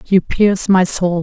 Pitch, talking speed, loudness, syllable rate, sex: 185 Hz, 195 wpm, -14 LUFS, 4.2 syllables/s, female